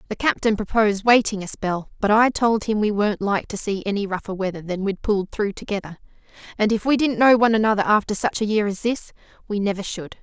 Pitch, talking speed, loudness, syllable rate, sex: 210 Hz, 230 wpm, -21 LUFS, 6.1 syllables/s, female